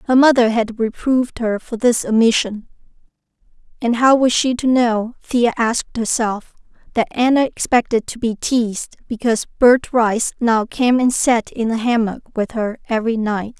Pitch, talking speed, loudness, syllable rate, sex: 235 Hz, 165 wpm, -17 LUFS, 4.7 syllables/s, female